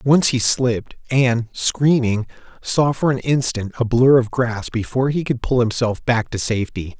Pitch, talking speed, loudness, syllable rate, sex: 120 Hz, 180 wpm, -19 LUFS, 4.6 syllables/s, male